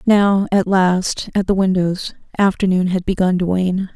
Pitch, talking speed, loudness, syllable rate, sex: 190 Hz, 165 wpm, -17 LUFS, 4.3 syllables/s, female